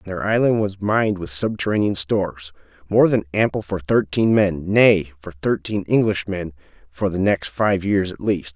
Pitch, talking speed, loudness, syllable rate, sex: 95 Hz, 155 wpm, -20 LUFS, 4.7 syllables/s, male